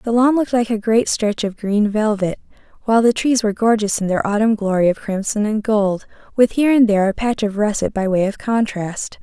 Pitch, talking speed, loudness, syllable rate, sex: 215 Hz, 230 wpm, -18 LUFS, 5.6 syllables/s, female